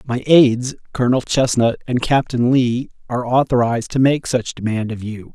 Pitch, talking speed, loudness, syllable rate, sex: 125 Hz, 170 wpm, -17 LUFS, 5.1 syllables/s, male